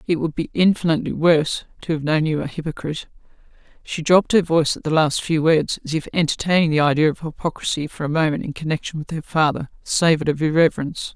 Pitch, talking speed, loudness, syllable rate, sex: 160 Hz, 205 wpm, -20 LUFS, 6.6 syllables/s, female